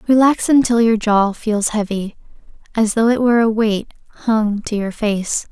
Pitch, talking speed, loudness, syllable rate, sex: 220 Hz, 175 wpm, -17 LUFS, 4.6 syllables/s, female